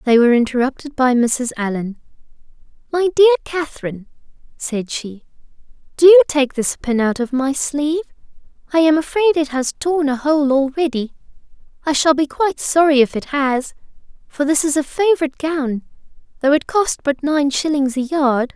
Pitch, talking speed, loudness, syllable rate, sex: 285 Hz, 160 wpm, -17 LUFS, 5.1 syllables/s, female